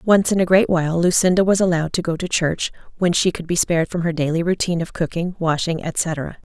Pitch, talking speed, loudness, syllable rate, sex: 170 Hz, 230 wpm, -19 LUFS, 6.0 syllables/s, female